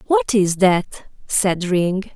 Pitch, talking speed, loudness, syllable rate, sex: 190 Hz, 140 wpm, -18 LUFS, 3.0 syllables/s, female